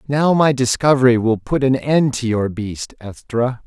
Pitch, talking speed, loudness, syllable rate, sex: 125 Hz, 180 wpm, -17 LUFS, 4.4 syllables/s, male